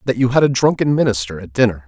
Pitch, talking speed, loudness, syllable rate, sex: 115 Hz, 255 wpm, -16 LUFS, 7.0 syllables/s, male